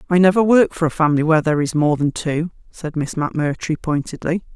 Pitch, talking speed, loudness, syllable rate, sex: 160 Hz, 210 wpm, -18 LUFS, 6.3 syllables/s, female